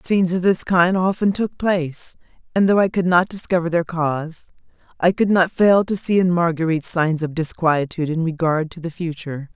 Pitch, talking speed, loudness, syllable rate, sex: 170 Hz, 195 wpm, -19 LUFS, 5.4 syllables/s, female